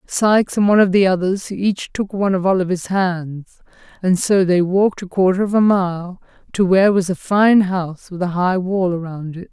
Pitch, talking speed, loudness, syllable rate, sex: 185 Hz, 210 wpm, -17 LUFS, 5.1 syllables/s, female